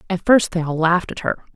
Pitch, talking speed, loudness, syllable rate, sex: 175 Hz, 270 wpm, -18 LUFS, 6.2 syllables/s, female